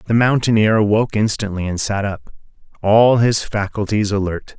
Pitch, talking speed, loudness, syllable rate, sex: 105 Hz, 145 wpm, -17 LUFS, 4.9 syllables/s, male